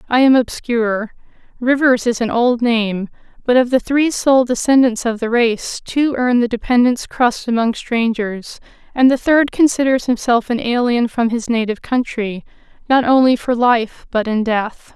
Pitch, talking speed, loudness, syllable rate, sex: 240 Hz, 165 wpm, -16 LUFS, 4.6 syllables/s, female